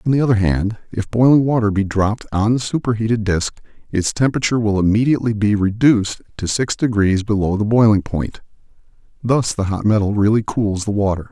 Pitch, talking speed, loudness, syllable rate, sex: 110 Hz, 180 wpm, -17 LUFS, 5.9 syllables/s, male